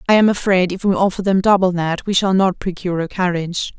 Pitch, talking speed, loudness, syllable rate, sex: 185 Hz, 240 wpm, -17 LUFS, 6.1 syllables/s, female